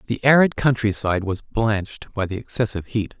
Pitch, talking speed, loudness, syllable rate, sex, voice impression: 110 Hz, 170 wpm, -21 LUFS, 5.8 syllables/s, male, masculine, adult-like, tensed, bright, clear, fluent, intellectual, friendly, lively, slightly intense